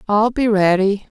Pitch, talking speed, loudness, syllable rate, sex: 210 Hz, 150 wpm, -16 LUFS, 4.3 syllables/s, female